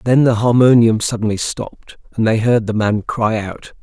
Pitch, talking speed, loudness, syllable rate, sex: 110 Hz, 190 wpm, -15 LUFS, 4.8 syllables/s, male